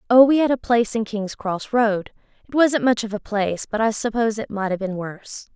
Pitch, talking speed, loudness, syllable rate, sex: 220 Hz, 240 wpm, -21 LUFS, 5.7 syllables/s, female